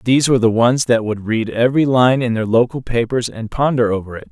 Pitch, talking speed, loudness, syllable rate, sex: 120 Hz, 235 wpm, -16 LUFS, 5.9 syllables/s, male